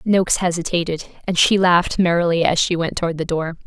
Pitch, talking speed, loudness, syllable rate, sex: 175 Hz, 195 wpm, -18 LUFS, 6.0 syllables/s, female